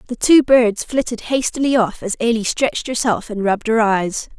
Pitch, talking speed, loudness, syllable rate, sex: 230 Hz, 190 wpm, -17 LUFS, 5.1 syllables/s, female